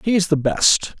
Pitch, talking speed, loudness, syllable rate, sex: 165 Hz, 240 wpm, -17 LUFS, 4.6 syllables/s, male